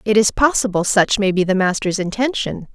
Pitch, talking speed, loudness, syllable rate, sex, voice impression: 205 Hz, 195 wpm, -17 LUFS, 5.4 syllables/s, female, feminine, adult-like, powerful, slightly bright, fluent, raspy, intellectual, calm, friendly, elegant, slightly sharp